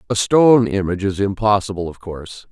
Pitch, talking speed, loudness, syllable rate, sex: 100 Hz, 165 wpm, -17 LUFS, 6.1 syllables/s, male